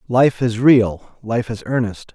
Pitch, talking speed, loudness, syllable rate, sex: 115 Hz, 170 wpm, -17 LUFS, 3.9 syllables/s, male